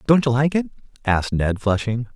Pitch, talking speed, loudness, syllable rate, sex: 125 Hz, 195 wpm, -21 LUFS, 5.7 syllables/s, male